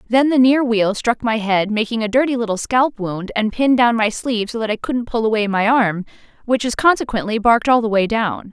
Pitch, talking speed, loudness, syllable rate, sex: 225 Hz, 240 wpm, -17 LUFS, 5.5 syllables/s, female